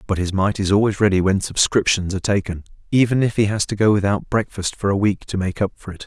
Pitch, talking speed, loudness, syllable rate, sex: 100 Hz, 255 wpm, -19 LUFS, 6.2 syllables/s, male